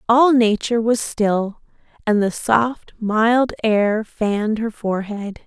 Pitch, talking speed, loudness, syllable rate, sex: 220 Hz, 130 wpm, -19 LUFS, 3.6 syllables/s, female